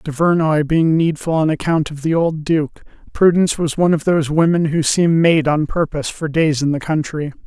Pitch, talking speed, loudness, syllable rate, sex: 155 Hz, 200 wpm, -16 LUFS, 5.3 syllables/s, male